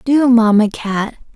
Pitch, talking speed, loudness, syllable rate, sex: 230 Hz, 135 wpm, -14 LUFS, 3.8 syllables/s, female